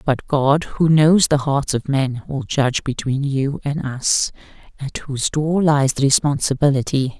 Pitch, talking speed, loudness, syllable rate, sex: 140 Hz, 165 wpm, -18 LUFS, 4.4 syllables/s, female